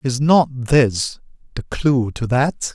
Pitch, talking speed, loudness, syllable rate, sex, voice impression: 130 Hz, 155 wpm, -18 LUFS, 3.1 syllables/s, male, masculine, adult-like, tensed, powerful, soft, clear, halting, sincere, calm, friendly, reassuring, unique, slightly wild, slightly lively, slightly kind